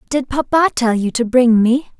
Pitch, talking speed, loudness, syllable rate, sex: 250 Hz, 210 wpm, -15 LUFS, 4.7 syllables/s, female